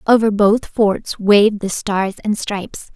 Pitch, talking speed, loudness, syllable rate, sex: 205 Hz, 165 wpm, -16 LUFS, 4.2 syllables/s, female